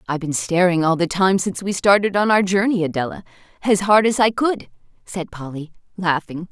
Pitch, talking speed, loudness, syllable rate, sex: 180 Hz, 195 wpm, -19 LUFS, 5.6 syllables/s, female